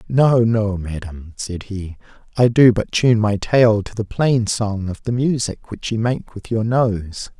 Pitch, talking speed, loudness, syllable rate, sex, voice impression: 110 Hz, 195 wpm, -18 LUFS, 3.9 syllables/s, male, very masculine, very middle-aged, very thick, relaxed, very weak, dark, very soft, very muffled, slightly halting, raspy, very cool, very intellectual, slightly refreshing, very sincere, very calm, very mature, very friendly, reassuring, very unique, elegant, very wild, sweet, slightly lively, very kind, modest